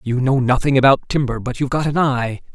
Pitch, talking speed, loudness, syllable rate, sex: 130 Hz, 235 wpm, -17 LUFS, 6.0 syllables/s, male